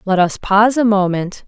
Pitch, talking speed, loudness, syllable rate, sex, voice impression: 205 Hz, 205 wpm, -15 LUFS, 5.2 syllables/s, female, feminine, slightly gender-neutral, adult-like, slightly middle-aged, tensed, slightly powerful, bright, slightly soft, clear, fluent, cool, intellectual, slightly refreshing, sincere, calm, friendly, slightly reassuring, slightly wild, lively, kind, slightly modest